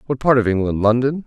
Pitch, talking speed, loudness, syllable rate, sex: 120 Hz, 190 wpm, -17 LUFS, 6.3 syllables/s, male